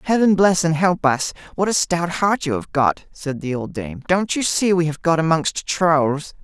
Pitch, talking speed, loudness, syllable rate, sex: 165 Hz, 225 wpm, -19 LUFS, 4.4 syllables/s, male